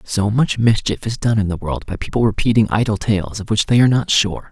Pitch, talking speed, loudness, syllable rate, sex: 105 Hz, 255 wpm, -17 LUFS, 5.7 syllables/s, male